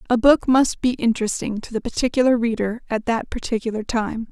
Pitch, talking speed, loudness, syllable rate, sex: 230 Hz, 180 wpm, -21 LUFS, 5.7 syllables/s, female